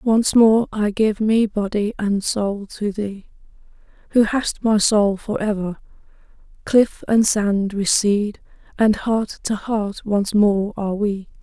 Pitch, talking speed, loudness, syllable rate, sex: 210 Hz, 145 wpm, -19 LUFS, 3.6 syllables/s, female